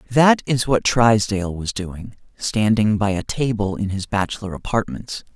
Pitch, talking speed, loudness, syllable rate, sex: 105 Hz, 155 wpm, -20 LUFS, 4.6 syllables/s, male